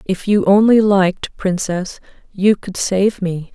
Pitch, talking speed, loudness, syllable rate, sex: 195 Hz, 150 wpm, -16 LUFS, 3.8 syllables/s, female